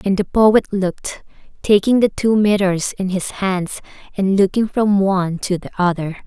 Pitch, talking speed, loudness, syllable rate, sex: 195 Hz, 165 wpm, -17 LUFS, 4.5 syllables/s, female